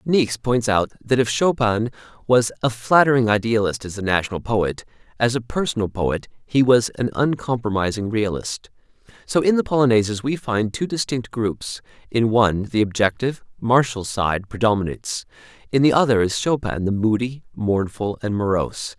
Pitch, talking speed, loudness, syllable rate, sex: 115 Hz, 155 wpm, -21 LUFS, 5.1 syllables/s, male